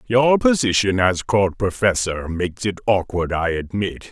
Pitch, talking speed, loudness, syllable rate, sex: 100 Hz, 145 wpm, -19 LUFS, 4.4 syllables/s, male